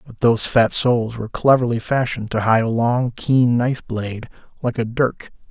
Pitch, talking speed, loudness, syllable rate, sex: 120 Hz, 185 wpm, -19 LUFS, 5.4 syllables/s, male